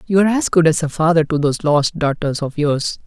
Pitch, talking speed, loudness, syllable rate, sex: 160 Hz, 255 wpm, -17 LUFS, 5.9 syllables/s, male